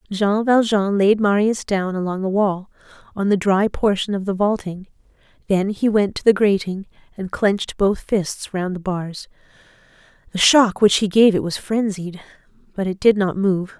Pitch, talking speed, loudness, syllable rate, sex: 200 Hz, 180 wpm, -19 LUFS, 4.6 syllables/s, female